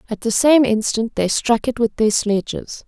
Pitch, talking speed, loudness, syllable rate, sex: 230 Hz, 210 wpm, -18 LUFS, 4.5 syllables/s, female